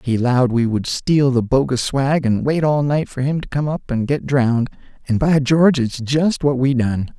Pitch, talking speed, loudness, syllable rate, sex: 135 Hz, 235 wpm, -18 LUFS, 5.0 syllables/s, male